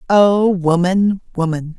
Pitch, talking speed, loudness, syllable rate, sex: 185 Hz, 100 wpm, -16 LUFS, 3.4 syllables/s, female